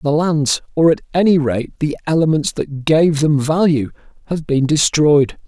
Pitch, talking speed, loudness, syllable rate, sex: 150 Hz, 165 wpm, -16 LUFS, 4.4 syllables/s, male